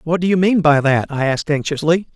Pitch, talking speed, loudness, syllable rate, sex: 160 Hz, 250 wpm, -16 LUFS, 6.0 syllables/s, male